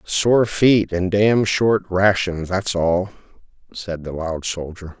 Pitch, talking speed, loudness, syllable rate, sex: 95 Hz, 145 wpm, -19 LUFS, 3.5 syllables/s, male